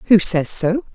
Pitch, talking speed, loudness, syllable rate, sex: 200 Hz, 190 wpm, -17 LUFS, 3.6 syllables/s, female